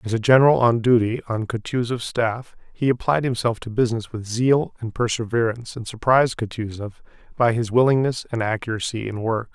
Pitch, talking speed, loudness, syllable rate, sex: 115 Hz, 170 wpm, -21 LUFS, 5.6 syllables/s, male